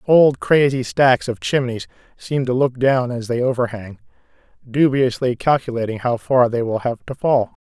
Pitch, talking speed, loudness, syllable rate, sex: 125 Hz, 165 wpm, -18 LUFS, 4.6 syllables/s, male